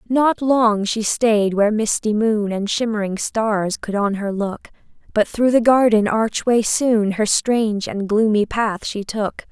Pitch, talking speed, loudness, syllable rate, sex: 215 Hz, 170 wpm, -18 LUFS, 3.9 syllables/s, female